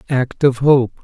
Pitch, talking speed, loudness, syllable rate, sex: 130 Hz, 175 wpm, -15 LUFS, 3.9 syllables/s, male